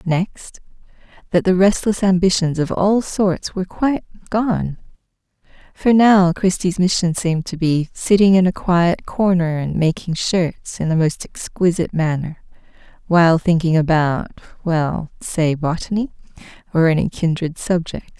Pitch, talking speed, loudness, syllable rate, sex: 175 Hz, 130 wpm, -18 LUFS, 4.4 syllables/s, female